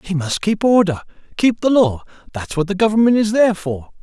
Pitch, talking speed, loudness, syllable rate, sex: 190 Hz, 210 wpm, -16 LUFS, 5.6 syllables/s, male